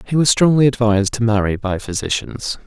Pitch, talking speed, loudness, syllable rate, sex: 115 Hz, 180 wpm, -17 LUFS, 5.8 syllables/s, male